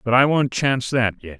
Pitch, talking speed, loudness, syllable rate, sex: 120 Hz, 260 wpm, -19 LUFS, 5.8 syllables/s, male